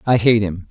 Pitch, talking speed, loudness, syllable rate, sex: 105 Hz, 255 wpm, -16 LUFS, 5.2 syllables/s, male